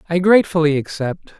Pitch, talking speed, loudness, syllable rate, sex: 165 Hz, 130 wpm, -17 LUFS, 6.0 syllables/s, male